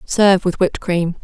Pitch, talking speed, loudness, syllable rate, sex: 185 Hz, 195 wpm, -16 LUFS, 5.5 syllables/s, female